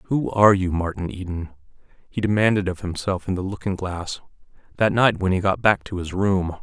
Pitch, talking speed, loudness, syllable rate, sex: 95 Hz, 200 wpm, -22 LUFS, 5.4 syllables/s, male